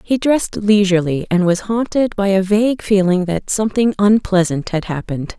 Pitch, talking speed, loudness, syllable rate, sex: 200 Hz, 165 wpm, -16 LUFS, 5.4 syllables/s, female